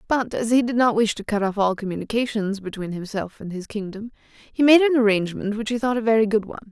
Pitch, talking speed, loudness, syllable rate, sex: 220 Hz, 240 wpm, -22 LUFS, 6.5 syllables/s, female